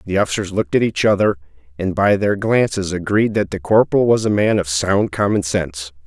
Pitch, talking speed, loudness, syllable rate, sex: 95 Hz, 210 wpm, -17 LUFS, 5.7 syllables/s, male